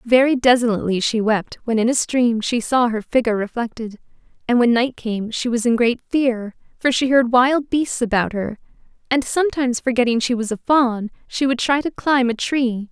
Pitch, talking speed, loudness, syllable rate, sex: 240 Hz, 200 wpm, -19 LUFS, 5.1 syllables/s, female